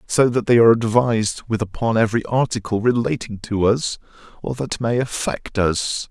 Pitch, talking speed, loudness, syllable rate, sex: 115 Hz, 165 wpm, -19 LUFS, 5.1 syllables/s, male